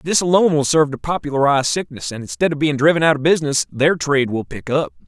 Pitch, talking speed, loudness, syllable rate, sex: 145 Hz, 235 wpm, -17 LUFS, 6.9 syllables/s, male